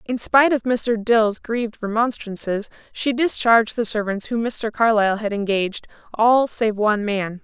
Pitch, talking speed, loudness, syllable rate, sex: 220 Hz, 160 wpm, -20 LUFS, 4.8 syllables/s, female